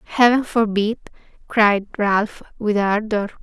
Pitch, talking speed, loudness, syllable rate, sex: 215 Hz, 105 wpm, -19 LUFS, 3.8 syllables/s, female